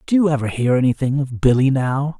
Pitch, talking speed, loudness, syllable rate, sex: 135 Hz, 220 wpm, -18 LUFS, 5.8 syllables/s, male